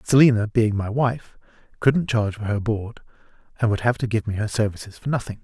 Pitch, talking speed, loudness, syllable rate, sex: 110 Hz, 210 wpm, -22 LUFS, 5.7 syllables/s, male